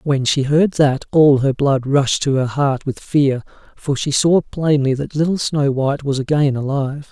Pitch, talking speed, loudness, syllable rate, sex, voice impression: 140 Hz, 205 wpm, -17 LUFS, 4.6 syllables/s, male, very masculine, very adult-like, slightly middle-aged, slightly thick, very relaxed, weak, dark, very soft, slightly clear, fluent, very cool, very intellectual, very refreshing, very sincere, very calm, very friendly, very reassuring, unique, very elegant, very sweet, very kind, very modest